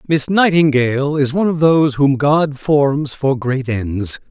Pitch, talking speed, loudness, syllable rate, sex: 140 Hz, 165 wpm, -15 LUFS, 4.2 syllables/s, male